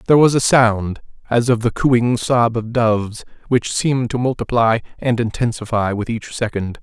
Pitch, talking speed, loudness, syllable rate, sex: 115 Hz, 175 wpm, -17 LUFS, 4.8 syllables/s, male